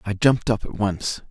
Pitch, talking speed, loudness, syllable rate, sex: 105 Hz, 230 wpm, -22 LUFS, 5.3 syllables/s, male